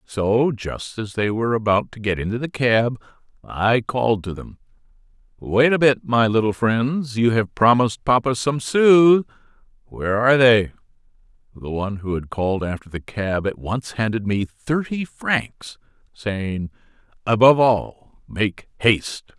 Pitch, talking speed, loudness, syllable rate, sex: 115 Hz, 150 wpm, -20 LUFS, 4.4 syllables/s, male